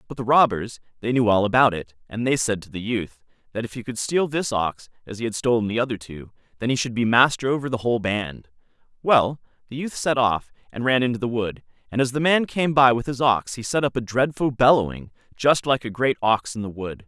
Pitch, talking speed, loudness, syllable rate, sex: 120 Hz, 245 wpm, -22 LUFS, 5.7 syllables/s, male